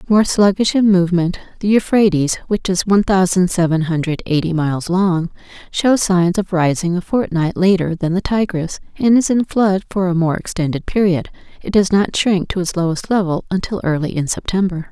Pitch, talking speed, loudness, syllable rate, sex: 185 Hz, 185 wpm, -16 LUFS, 5.2 syllables/s, female